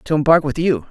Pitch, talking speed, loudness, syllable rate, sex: 155 Hz, 265 wpm, -16 LUFS, 6.3 syllables/s, male